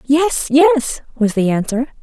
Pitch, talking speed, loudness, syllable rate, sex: 270 Hz, 150 wpm, -15 LUFS, 3.6 syllables/s, female